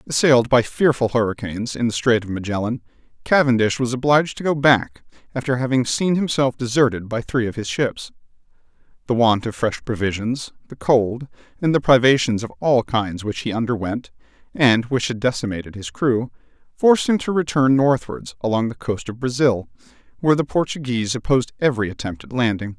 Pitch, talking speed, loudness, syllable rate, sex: 120 Hz, 170 wpm, -20 LUFS, 5.6 syllables/s, male